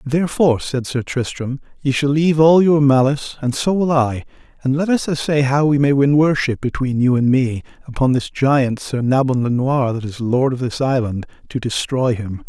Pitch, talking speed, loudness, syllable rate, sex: 135 Hz, 205 wpm, -17 LUFS, 5.2 syllables/s, male